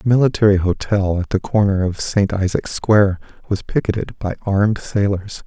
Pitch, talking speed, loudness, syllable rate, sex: 100 Hz, 165 wpm, -18 LUFS, 5.1 syllables/s, male